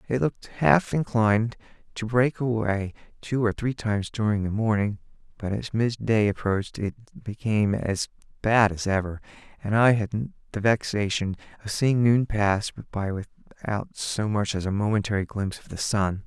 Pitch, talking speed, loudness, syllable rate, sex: 110 Hz, 165 wpm, -25 LUFS, 4.6 syllables/s, male